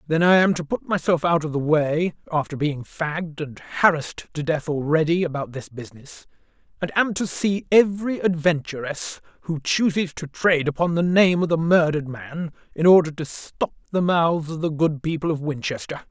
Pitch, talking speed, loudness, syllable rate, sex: 160 Hz, 180 wpm, -22 LUFS, 5.1 syllables/s, male